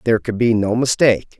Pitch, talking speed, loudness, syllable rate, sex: 115 Hz, 215 wpm, -17 LUFS, 6.3 syllables/s, male